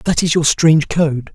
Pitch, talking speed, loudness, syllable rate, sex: 155 Hz, 220 wpm, -14 LUFS, 5.0 syllables/s, male